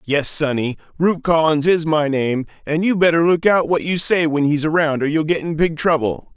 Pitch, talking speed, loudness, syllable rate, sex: 155 Hz, 225 wpm, -18 LUFS, 5.0 syllables/s, male